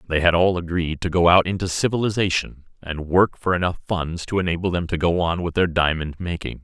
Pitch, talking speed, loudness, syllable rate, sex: 85 Hz, 215 wpm, -21 LUFS, 5.7 syllables/s, male